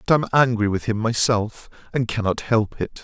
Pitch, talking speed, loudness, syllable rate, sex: 115 Hz, 220 wpm, -21 LUFS, 5.3 syllables/s, male